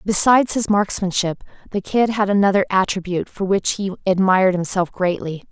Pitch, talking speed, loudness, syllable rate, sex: 195 Hz, 150 wpm, -18 LUFS, 5.5 syllables/s, female